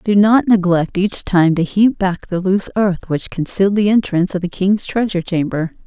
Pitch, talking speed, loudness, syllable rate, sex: 190 Hz, 205 wpm, -16 LUFS, 5.2 syllables/s, female